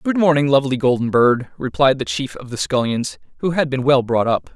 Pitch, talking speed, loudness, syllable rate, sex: 135 Hz, 225 wpm, -18 LUFS, 5.5 syllables/s, male